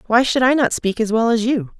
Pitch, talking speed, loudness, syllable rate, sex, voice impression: 235 Hz, 300 wpm, -17 LUFS, 5.6 syllables/s, female, feminine, adult-like, weak, slightly hard, fluent, slightly raspy, intellectual, calm, sharp